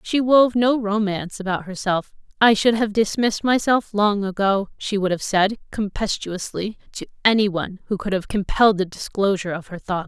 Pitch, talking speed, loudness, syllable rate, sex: 205 Hz, 180 wpm, -21 LUFS, 5.3 syllables/s, female